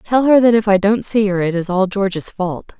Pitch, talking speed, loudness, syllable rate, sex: 200 Hz, 280 wpm, -16 LUFS, 5.1 syllables/s, female